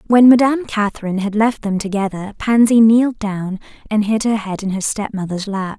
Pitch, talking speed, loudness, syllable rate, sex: 210 Hz, 185 wpm, -16 LUFS, 5.5 syllables/s, female